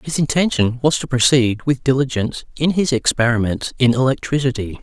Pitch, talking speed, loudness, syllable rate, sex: 130 Hz, 150 wpm, -17 LUFS, 5.5 syllables/s, male